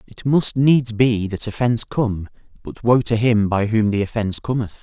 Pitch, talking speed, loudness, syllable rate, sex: 115 Hz, 200 wpm, -19 LUFS, 4.9 syllables/s, male